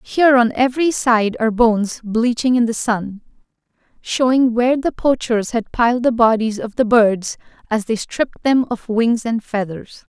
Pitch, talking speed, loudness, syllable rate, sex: 230 Hz, 170 wpm, -17 LUFS, 4.8 syllables/s, female